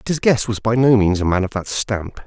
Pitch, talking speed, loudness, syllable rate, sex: 110 Hz, 320 wpm, -18 LUFS, 5.5 syllables/s, male